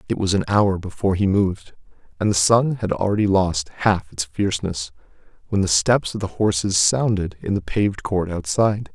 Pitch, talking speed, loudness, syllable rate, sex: 95 Hz, 190 wpm, -20 LUFS, 5.2 syllables/s, male